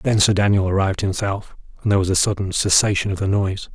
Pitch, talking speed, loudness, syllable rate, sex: 100 Hz, 225 wpm, -19 LUFS, 6.7 syllables/s, male